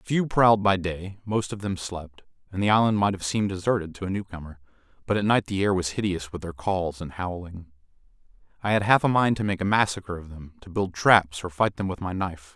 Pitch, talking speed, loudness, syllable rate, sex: 95 Hz, 245 wpm, -25 LUFS, 5.8 syllables/s, male